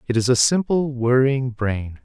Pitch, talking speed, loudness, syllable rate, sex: 125 Hz, 175 wpm, -19 LUFS, 4.3 syllables/s, male